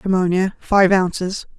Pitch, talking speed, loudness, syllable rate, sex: 185 Hz, 115 wpm, -18 LUFS, 4.4 syllables/s, female